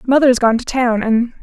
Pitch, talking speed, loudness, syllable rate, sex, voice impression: 240 Hz, 170 wpm, -15 LUFS, 5.0 syllables/s, female, feminine, slightly adult-like, slightly soft, slightly cute, slightly intellectual, calm, slightly kind